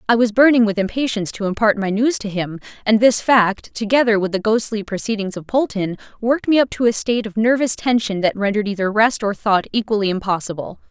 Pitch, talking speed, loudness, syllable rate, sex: 215 Hz, 210 wpm, -18 LUFS, 6.1 syllables/s, female